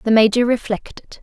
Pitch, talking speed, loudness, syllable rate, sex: 225 Hz, 145 wpm, -17 LUFS, 5.4 syllables/s, female